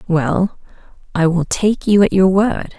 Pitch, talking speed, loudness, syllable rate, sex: 185 Hz, 170 wpm, -15 LUFS, 3.9 syllables/s, female